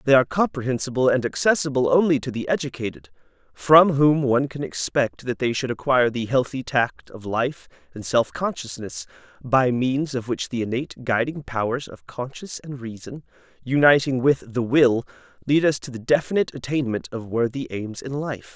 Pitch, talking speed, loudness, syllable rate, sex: 130 Hz, 170 wpm, -22 LUFS, 5.3 syllables/s, male